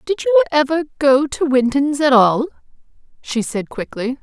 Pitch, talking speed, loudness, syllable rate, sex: 260 Hz, 155 wpm, -17 LUFS, 4.5 syllables/s, female